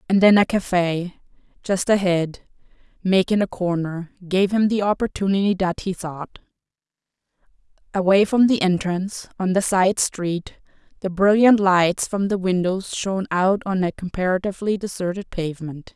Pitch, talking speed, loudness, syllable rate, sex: 190 Hz, 140 wpm, -21 LUFS, 4.8 syllables/s, female